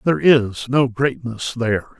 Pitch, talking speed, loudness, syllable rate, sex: 125 Hz, 150 wpm, -19 LUFS, 4.4 syllables/s, male